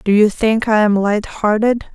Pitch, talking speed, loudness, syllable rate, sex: 215 Hz, 155 wpm, -15 LUFS, 3.8 syllables/s, female